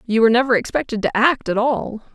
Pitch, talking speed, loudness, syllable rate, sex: 230 Hz, 225 wpm, -18 LUFS, 6.3 syllables/s, female